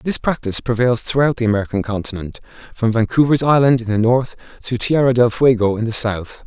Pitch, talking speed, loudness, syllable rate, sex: 120 Hz, 185 wpm, -16 LUFS, 5.8 syllables/s, male